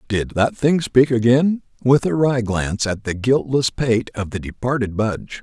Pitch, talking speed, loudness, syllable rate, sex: 125 Hz, 190 wpm, -19 LUFS, 4.6 syllables/s, male